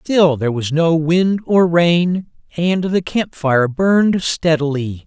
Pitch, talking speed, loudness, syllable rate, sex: 165 Hz, 140 wpm, -16 LUFS, 3.8 syllables/s, male